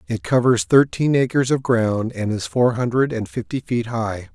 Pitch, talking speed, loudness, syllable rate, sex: 120 Hz, 195 wpm, -20 LUFS, 4.6 syllables/s, male